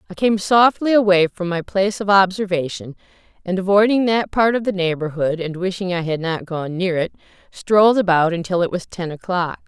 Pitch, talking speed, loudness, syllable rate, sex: 185 Hz, 190 wpm, -18 LUFS, 5.4 syllables/s, female